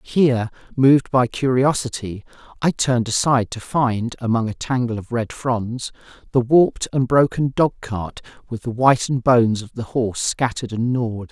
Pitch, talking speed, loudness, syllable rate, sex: 120 Hz, 165 wpm, -20 LUFS, 5.1 syllables/s, male